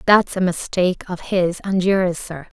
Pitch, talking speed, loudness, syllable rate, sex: 180 Hz, 185 wpm, -20 LUFS, 4.3 syllables/s, female